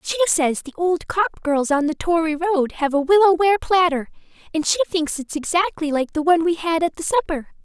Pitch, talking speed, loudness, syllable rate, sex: 330 Hz, 220 wpm, -20 LUFS, 5.5 syllables/s, female